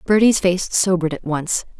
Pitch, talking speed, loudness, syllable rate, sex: 180 Hz, 165 wpm, -18 LUFS, 5.1 syllables/s, female